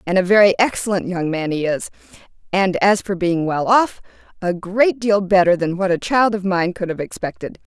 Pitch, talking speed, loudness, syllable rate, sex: 190 Hz, 200 wpm, -18 LUFS, 5.2 syllables/s, female